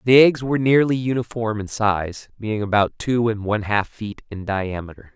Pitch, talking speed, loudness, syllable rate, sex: 110 Hz, 185 wpm, -21 LUFS, 4.9 syllables/s, male